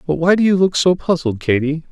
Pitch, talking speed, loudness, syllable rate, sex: 165 Hz, 250 wpm, -16 LUFS, 5.7 syllables/s, male